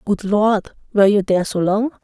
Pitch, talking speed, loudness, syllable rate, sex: 205 Hz, 175 wpm, -17 LUFS, 5.5 syllables/s, female